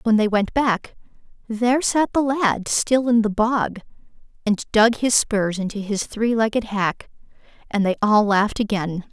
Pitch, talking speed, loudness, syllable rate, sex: 220 Hz, 170 wpm, -20 LUFS, 4.3 syllables/s, female